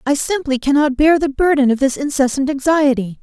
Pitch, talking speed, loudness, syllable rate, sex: 280 Hz, 185 wpm, -15 LUFS, 5.5 syllables/s, female